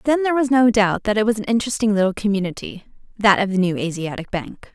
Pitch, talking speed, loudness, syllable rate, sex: 210 Hz, 230 wpm, -19 LUFS, 6.5 syllables/s, female